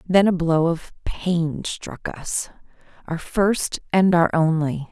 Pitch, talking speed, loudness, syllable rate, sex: 170 Hz, 145 wpm, -21 LUFS, 3.3 syllables/s, female